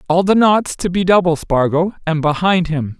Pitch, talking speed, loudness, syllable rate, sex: 170 Hz, 200 wpm, -15 LUFS, 4.8 syllables/s, male